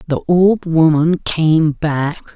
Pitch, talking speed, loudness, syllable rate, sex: 160 Hz, 130 wpm, -14 LUFS, 2.9 syllables/s, male